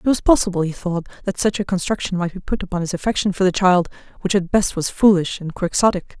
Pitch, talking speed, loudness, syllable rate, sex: 185 Hz, 240 wpm, -19 LUFS, 6.2 syllables/s, female